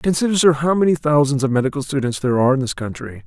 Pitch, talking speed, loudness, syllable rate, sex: 145 Hz, 240 wpm, -18 LUFS, 7.1 syllables/s, male